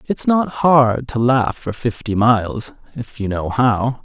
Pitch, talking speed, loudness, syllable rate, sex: 120 Hz, 180 wpm, -17 LUFS, 3.8 syllables/s, male